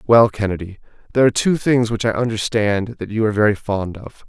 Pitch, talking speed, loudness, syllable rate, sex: 110 Hz, 210 wpm, -18 LUFS, 6.1 syllables/s, male